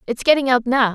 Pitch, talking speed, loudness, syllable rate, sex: 250 Hz, 255 wpm, -17 LUFS, 6.2 syllables/s, female